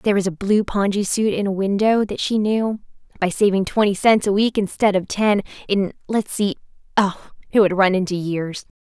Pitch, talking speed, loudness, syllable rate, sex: 200 Hz, 185 wpm, -20 LUFS, 5.1 syllables/s, female